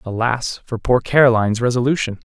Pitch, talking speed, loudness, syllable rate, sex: 120 Hz, 130 wpm, -17 LUFS, 5.8 syllables/s, male